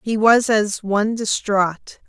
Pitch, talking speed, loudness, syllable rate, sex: 210 Hz, 145 wpm, -18 LUFS, 3.7 syllables/s, female